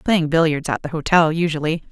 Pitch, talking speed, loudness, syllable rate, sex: 160 Hz, 190 wpm, -19 LUFS, 5.7 syllables/s, female